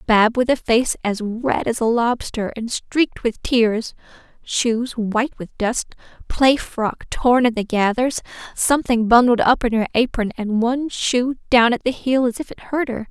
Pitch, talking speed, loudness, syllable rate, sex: 235 Hz, 185 wpm, -19 LUFS, 4.4 syllables/s, female